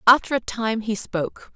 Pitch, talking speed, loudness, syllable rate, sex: 225 Hz, 195 wpm, -23 LUFS, 5.0 syllables/s, female